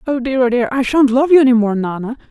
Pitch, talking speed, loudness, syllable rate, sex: 250 Hz, 285 wpm, -14 LUFS, 6.3 syllables/s, female